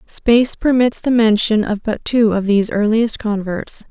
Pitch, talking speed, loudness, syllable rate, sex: 220 Hz, 170 wpm, -16 LUFS, 4.5 syllables/s, female